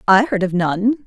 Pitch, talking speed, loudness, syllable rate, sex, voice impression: 210 Hz, 225 wpm, -17 LUFS, 4.3 syllables/s, female, very feminine, very adult-like, thin, tensed, relaxed, slightly powerful, bright, slightly soft, clear, slightly fluent, raspy, slightly cute, slightly intellectual, slightly refreshing, sincere, slightly calm, slightly friendly, slightly reassuring, unique, slightly elegant, wild, slightly sweet, lively, kind